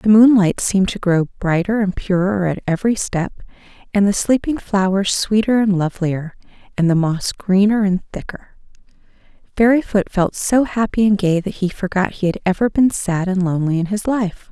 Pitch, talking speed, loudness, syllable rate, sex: 195 Hz, 180 wpm, -17 LUFS, 5.3 syllables/s, female